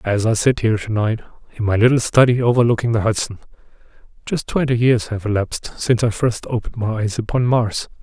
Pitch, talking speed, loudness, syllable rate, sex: 115 Hz, 185 wpm, -18 LUFS, 6.0 syllables/s, male